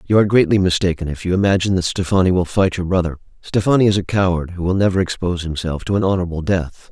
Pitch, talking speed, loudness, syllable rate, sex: 90 Hz, 225 wpm, -18 LUFS, 7.2 syllables/s, male